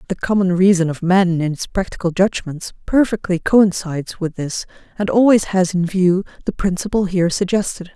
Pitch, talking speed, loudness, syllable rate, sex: 185 Hz, 165 wpm, -17 LUFS, 5.4 syllables/s, female